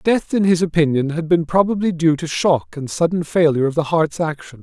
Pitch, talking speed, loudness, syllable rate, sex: 160 Hz, 220 wpm, -18 LUFS, 5.5 syllables/s, male